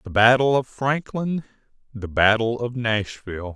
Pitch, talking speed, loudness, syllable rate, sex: 120 Hz, 120 wpm, -21 LUFS, 4.4 syllables/s, male